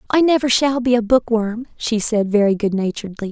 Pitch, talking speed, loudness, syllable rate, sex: 225 Hz, 215 wpm, -18 LUFS, 5.6 syllables/s, female